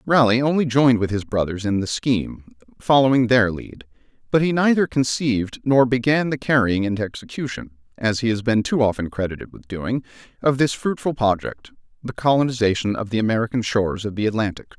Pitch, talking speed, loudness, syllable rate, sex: 115 Hz, 170 wpm, -20 LUFS, 5.9 syllables/s, male